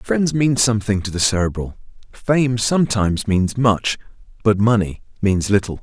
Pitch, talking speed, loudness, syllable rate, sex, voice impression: 110 Hz, 145 wpm, -18 LUFS, 4.9 syllables/s, male, very masculine, very adult-like, middle-aged, very thick, tensed, very powerful, bright, soft, clear, fluent, very cool, intellectual, refreshing, sincere, very calm, very mature, friendly, reassuring, slightly unique, slightly elegant, wild, sweet, slightly lively, kind